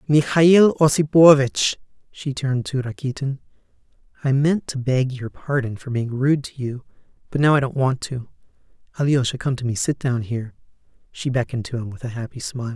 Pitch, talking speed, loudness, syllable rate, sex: 135 Hz, 180 wpm, -20 LUFS, 5.5 syllables/s, male